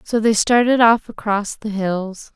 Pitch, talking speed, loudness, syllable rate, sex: 215 Hz, 180 wpm, -17 LUFS, 4.1 syllables/s, female